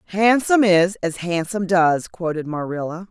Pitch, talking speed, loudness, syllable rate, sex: 180 Hz, 135 wpm, -19 LUFS, 5.0 syllables/s, female